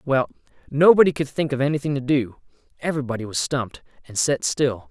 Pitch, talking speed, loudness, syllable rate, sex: 135 Hz, 170 wpm, -21 LUFS, 6.2 syllables/s, male